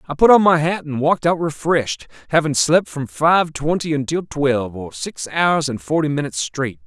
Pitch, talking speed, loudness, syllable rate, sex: 145 Hz, 200 wpm, -18 LUFS, 5.2 syllables/s, male